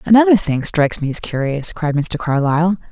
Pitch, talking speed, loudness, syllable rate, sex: 160 Hz, 185 wpm, -16 LUFS, 5.6 syllables/s, female